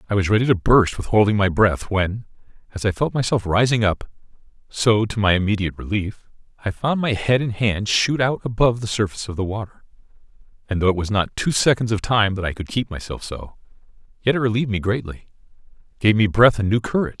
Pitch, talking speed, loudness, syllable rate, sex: 105 Hz, 215 wpm, -20 LUFS, 6.1 syllables/s, male